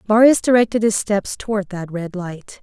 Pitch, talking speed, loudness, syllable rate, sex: 205 Hz, 185 wpm, -18 LUFS, 4.9 syllables/s, female